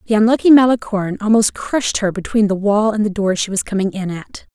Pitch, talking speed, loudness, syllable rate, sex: 210 Hz, 225 wpm, -16 LUFS, 6.1 syllables/s, female